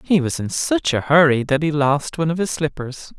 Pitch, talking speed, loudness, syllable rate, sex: 150 Hz, 245 wpm, -19 LUFS, 5.2 syllables/s, male